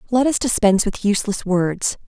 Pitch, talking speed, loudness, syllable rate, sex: 215 Hz, 175 wpm, -19 LUFS, 5.6 syllables/s, female